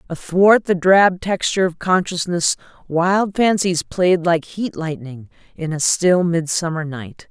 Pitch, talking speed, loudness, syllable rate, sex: 175 Hz, 140 wpm, -18 LUFS, 4.0 syllables/s, female